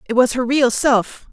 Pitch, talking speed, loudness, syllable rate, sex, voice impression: 250 Hz, 225 wpm, -17 LUFS, 4.5 syllables/s, female, feminine, adult-like, slightly powerful, slightly intellectual, slightly strict